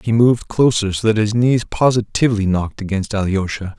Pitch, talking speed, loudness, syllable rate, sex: 105 Hz, 175 wpm, -17 LUFS, 5.6 syllables/s, male